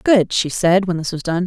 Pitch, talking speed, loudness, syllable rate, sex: 180 Hz, 285 wpm, -17 LUFS, 5.1 syllables/s, female